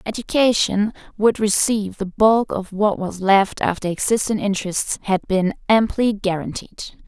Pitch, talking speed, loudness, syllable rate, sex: 205 Hz, 135 wpm, -19 LUFS, 4.6 syllables/s, female